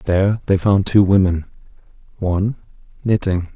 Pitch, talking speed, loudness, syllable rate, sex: 95 Hz, 120 wpm, -18 LUFS, 4.9 syllables/s, male